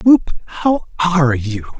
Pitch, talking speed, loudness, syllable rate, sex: 170 Hz, 135 wpm, -16 LUFS, 3.2 syllables/s, male